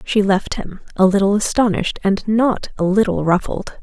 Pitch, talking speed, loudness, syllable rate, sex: 200 Hz, 170 wpm, -17 LUFS, 5.0 syllables/s, female